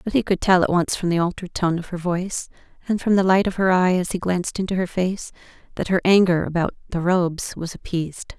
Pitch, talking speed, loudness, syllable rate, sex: 180 Hz, 245 wpm, -21 LUFS, 6.1 syllables/s, female